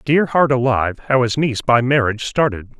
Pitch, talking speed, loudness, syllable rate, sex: 125 Hz, 195 wpm, -17 LUFS, 5.8 syllables/s, male